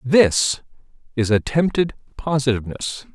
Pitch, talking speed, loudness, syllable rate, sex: 135 Hz, 75 wpm, -20 LUFS, 4.4 syllables/s, male